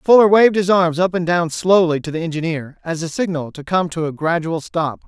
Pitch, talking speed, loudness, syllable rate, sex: 170 Hz, 235 wpm, -17 LUFS, 5.5 syllables/s, male